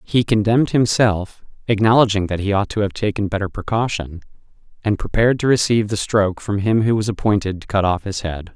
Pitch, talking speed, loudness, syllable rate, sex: 105 Hz, 195 wpm, -18 LUFS, 5.9 syllables/s, male